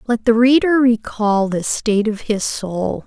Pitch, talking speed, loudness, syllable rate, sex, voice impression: 225 Hz, 175 wpm, -17 LUFS, 4.1 syllables/s, female, very feminine, slightly young, adult-like, thin, slightly tensed, slightly powerful, slightly dark, soft, slightly muffled, fluent, very cute, intellectual, refreshing, sincere, very calm, very friendly, very reassuring, very unique, elegant, slightly wild, very sweet, lively, slightly strict, slightly intense, slightly sharp, slightly light